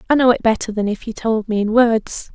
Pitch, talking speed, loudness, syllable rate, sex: 225 Hz, 280 wpm, -18 LUFS, 5.6 syllables/s, female